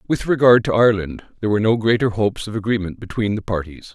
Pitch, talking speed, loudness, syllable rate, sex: 105 Hz, 215 wpm, -19 LUFS, 6.9 syllables/s, male